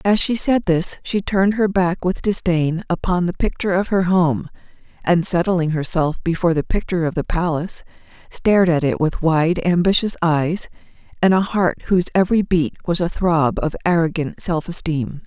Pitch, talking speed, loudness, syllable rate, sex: 175 Hz, 175 wpm, -19 LUFS, 5.2 syllables/s, female